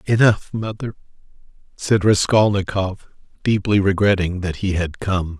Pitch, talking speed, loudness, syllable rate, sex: 100 Hz, 110 wpm, -19 LUFS, 4.3 syllables/s, male